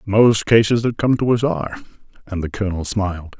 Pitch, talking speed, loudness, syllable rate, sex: 105 Hz, 195 wpm, -18 LUFS, 5.8 syllables/s, male